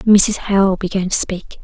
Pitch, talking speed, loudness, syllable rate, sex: 195 Hz, 185 wpm, -16 LUFS, 3.8 syllables/s, female